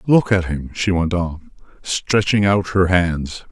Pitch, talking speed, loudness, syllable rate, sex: 90 Hz, 170 wpm, -18 LUFS, 3.7 syllables/s, male